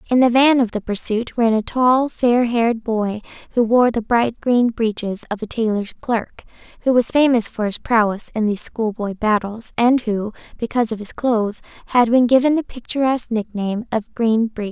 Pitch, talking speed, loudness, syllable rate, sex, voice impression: 230 Hz, 190 wpm, -19 LUFS, 5.0 syllables/s, female, feminine, young, soft, cute, slightly refreshing, friendly, slightly sweet, kind